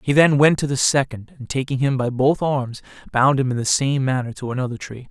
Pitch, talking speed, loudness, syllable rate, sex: 130 Hz, 245 wpm, -20 LUFS, 5.6 syllables/s, male